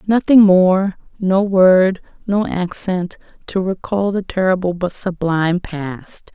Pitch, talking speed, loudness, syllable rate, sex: 185 Hz, 125 wpm, -16 LUFS, 3.7 syllables/s, female